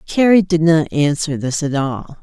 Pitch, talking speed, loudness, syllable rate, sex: 155 Hz, 190 wpm, -16 LUFS, 4.4 syllables/s, female